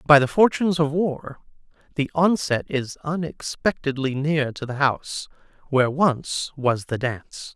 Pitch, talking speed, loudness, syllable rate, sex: 145 Hz, 145 wpm, -23 LUFS, 4.4 syllables/s, male